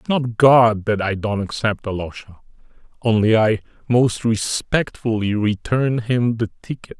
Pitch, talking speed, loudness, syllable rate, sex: 110 Hz, 135 wpm, -19 LUFS, 4.2 syllables/s, male